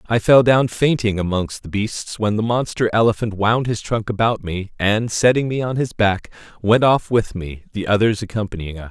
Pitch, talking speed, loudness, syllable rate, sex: 110 Hz, 200 wpm, -19 LUFS, 5.0 syllables/s, male